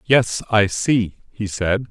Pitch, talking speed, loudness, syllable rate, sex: 110 Hz, 155 wpm, -20 LUFS, 3.1 syllables/s, male